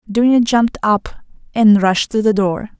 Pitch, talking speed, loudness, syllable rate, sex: 215 Hz, 170 wpm, -15 LUFS, 4.7 syllables/s, female